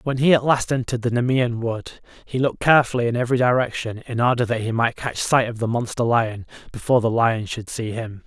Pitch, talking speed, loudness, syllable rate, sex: 120 Hz, 225 wpm, -21 LUFS, 6.0 syllables/s, male